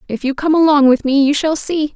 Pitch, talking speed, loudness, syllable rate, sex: 290 Hz, 275 wpm, -14 LUFS, 5.7 syllables/s, female